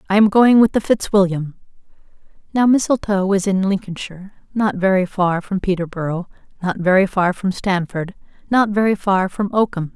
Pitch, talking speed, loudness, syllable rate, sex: 195 Hz, 155 wpm, -18 LUFS, 5.2 syllables/s, female